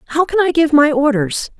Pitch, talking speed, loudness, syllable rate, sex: 290 Hz, 225 wpm, -14 LUFS, 5.7 syllables/s, female